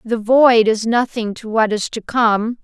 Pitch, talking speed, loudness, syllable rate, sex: 225 Hz, 205 wpm, -16 LUFS, 4.0 syllables/s, female